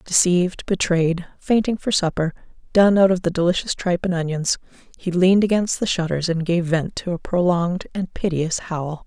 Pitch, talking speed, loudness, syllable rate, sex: 175 Hz, 180 wpm, -20 LUFS, 5.2 syllables/s, female